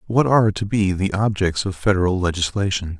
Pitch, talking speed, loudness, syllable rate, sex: 100 Hz, 180 wpm, -20 LUFS, 5.7 syllables/s, male